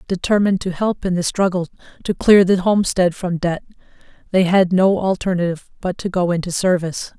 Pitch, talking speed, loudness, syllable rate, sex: 185 Hz, 175 wpm, -18 LUFS, 5.8 syllables/s, female